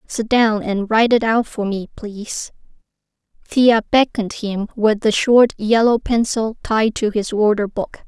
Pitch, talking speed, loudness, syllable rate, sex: 220 Hz, 165 wpm, -17 LUFS, 4.4 syllables/s, female